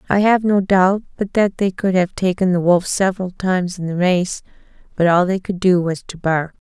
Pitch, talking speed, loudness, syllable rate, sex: 185 Hz, 225 wpm, -18 LUFS, 5.1 syllables/s, female